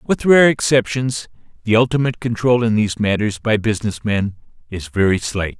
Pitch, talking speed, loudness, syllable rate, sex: 110 Hz, 160 wpm, -17 LUFS, 5.4 syllables/s, male